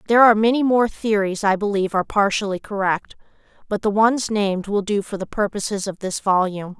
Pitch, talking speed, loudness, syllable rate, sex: 205 Hz, 195 wpm, -20 LUFS, 6.1 syllables/s, female